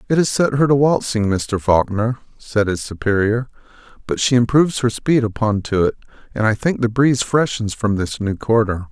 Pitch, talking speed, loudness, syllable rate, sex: 115 Hz, 195 wpm, -18 LUFS, 5.2 syllables/s, male